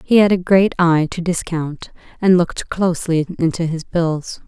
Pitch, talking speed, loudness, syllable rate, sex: 170 Hz, 175 wpm, -17 LUFS, 4.7 syllables/s, female